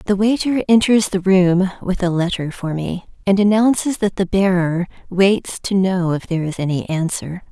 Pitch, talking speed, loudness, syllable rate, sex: 190 Hz, 185 wpm, -18 LUFS, 4.8 syllables/s, female